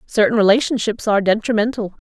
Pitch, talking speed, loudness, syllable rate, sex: 220 Hz, 115 wpm, -17 LUFS, 6.4 syllables/s, female